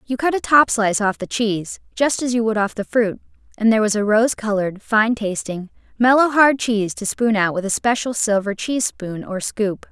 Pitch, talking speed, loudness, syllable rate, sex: 220 Hz, 225 wpm, -19 LUFS, 5.3 syllables/s, female